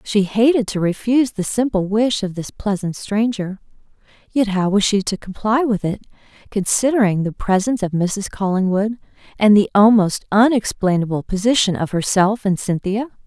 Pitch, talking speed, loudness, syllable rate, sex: 205 Hz, 155 wpm, -18 LUFS, 5.1 syllables/s, female